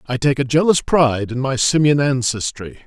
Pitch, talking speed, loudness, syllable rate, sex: 135 Hz, 190 wpm, -17 LUFS, 5.2 syllables/s, male